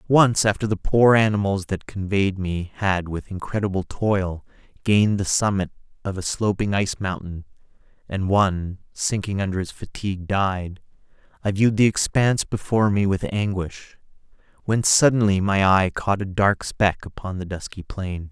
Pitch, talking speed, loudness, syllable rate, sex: 100 Hz, 155 wpm, -22 LUFS, 4.9 syllables/s, male